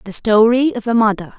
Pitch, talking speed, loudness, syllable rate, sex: 230 Hz, 215 wpm, -14 LUFS, 5.7 syllables/s, female